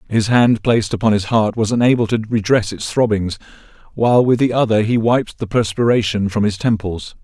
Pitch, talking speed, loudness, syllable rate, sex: 110 Hz, 190 wpm, -16 LUFS, 5.5 syllables/s, male